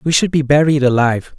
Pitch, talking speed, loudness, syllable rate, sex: 140 Hz, 215 wpm, -14 LUFS, 6.3 syllables/s, male